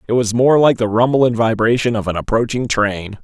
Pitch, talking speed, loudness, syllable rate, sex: 115 Hz, 220 wpm, -15 LUFS, 5.5 syllables/s, male